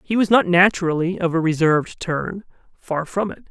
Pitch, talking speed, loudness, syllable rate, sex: 180 Hz, 190 wpm, -19 LUFS, 5.4 syllables/s, male